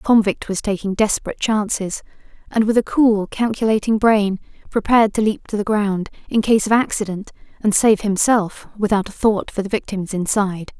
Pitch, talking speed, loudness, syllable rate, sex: 210 Hz, 180 wpm, -18 LUFS, 5.4 syllables/s, female